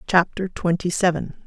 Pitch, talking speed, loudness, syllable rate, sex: 175 Hz, 125 wpm, -22 LUFS, 4.7 syllables/s, female